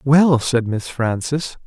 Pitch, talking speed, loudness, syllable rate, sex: 130 Hz, 145 wpm, -18 LUFS, 3.3 syllables/s, male